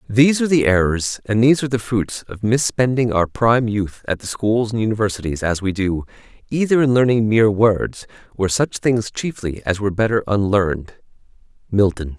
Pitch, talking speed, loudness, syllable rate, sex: 110 Hz, 170 wpm, -18 LUFS, 5.4 syllables/s, male